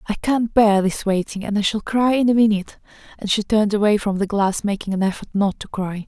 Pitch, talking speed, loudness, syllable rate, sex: 205 Hz, 245 wpm, -19 LUFS, 6.0 syllables/s, female